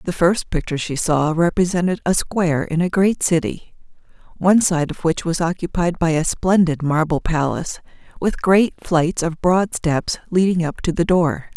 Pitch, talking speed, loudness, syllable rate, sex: 170 Hz, 175 wpm, -19 LUFS, 4.8 syllables/s, female